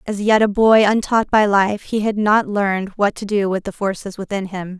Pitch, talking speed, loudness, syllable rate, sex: 205 Hz, 240 wpm, -17 LUFS, 5.0 syllables/s, female